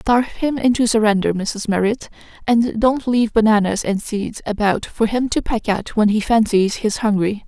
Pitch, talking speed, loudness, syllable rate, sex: 220 Hz, 185 wpm, -18 LUFS, 4.9 syllables/s, female